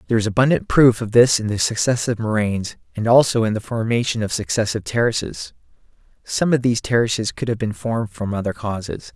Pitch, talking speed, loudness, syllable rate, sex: 110 Hz, 190 wpm, -19 LUFS, 6.3 syllables/s, male